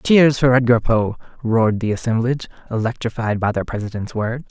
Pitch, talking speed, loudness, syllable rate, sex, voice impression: 115 Hz, 160 wpm, -19 LUFS, 5.5 syllables/s, male, masculine, adult-like, relaxed, slightly weak, bright, soft, muffled, slightly halting, slightly refreshing, friendly, reassuring, kind, modest